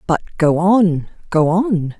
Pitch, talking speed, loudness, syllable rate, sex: 175 Hz, 150 wpm, -16 LUFS, 3.3 syllables/s, female